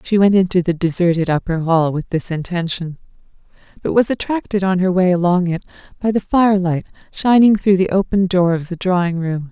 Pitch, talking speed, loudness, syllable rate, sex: 180 Hz, 190 wpm, -17 LUFS, 5.5 syllables/s, female